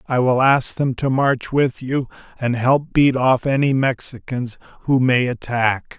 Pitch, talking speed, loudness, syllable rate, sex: 130 Hz, 170 wpm, -18 LUFS, 4.0 syllables/s, male